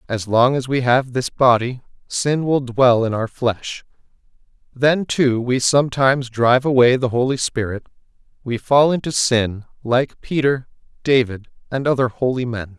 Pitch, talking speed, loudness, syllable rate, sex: 125 Hz, 155 wpm, -18 LUFS, 4.5 syllables/s, male